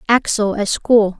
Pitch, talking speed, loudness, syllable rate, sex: 215 Hz, 150 wpm, -16 LUFS, 3.9 syllables/s, female